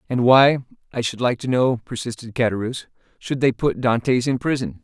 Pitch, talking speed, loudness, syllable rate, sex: 125 Hz, 185 wpm, -20 LUFS, 5.6 syllables/s, male